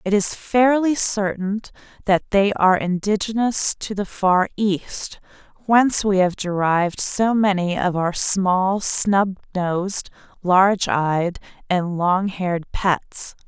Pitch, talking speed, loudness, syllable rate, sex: 195 Hz, 130 wpm, -19 LUFS, 3.7 syllables/s, female